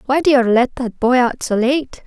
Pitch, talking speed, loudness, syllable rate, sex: 250 Hz, 260 wpm, -16 LUFS, 4.7 syllables/s, female